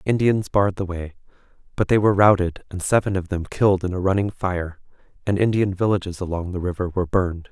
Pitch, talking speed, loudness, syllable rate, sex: 95 Hz, 200 wpm, -21 LUFS, 6.2 syllables/s, male